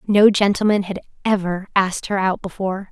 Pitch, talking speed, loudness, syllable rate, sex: 195 Hz, 165 wpm, -19 LUFS, 5.6 syllables/s, female